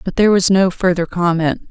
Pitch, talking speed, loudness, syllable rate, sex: 180 Hz, 210 wpm, -15 LUFS, 5.6 syllables/s, female